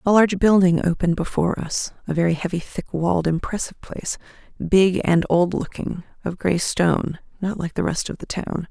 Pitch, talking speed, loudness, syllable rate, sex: 180 Hz, 185 wpm, -21 LUFS, 5.5 syllables/s, female